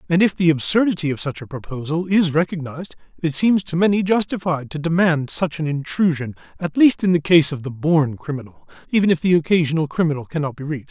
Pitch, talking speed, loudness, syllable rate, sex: 160 Hz, 205 wpm, -19 LUFS, 6.1 syllables/s, male